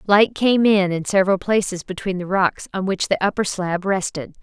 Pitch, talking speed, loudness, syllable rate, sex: 190 Hz, 205 wpm, -20 LUFS, 5.1 syllables/s, female